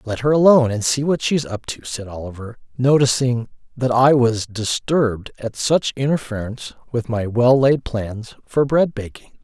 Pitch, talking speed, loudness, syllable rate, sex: 125 Hz, 170 wpm, -19 LUFS, 4.8 syllables/s, male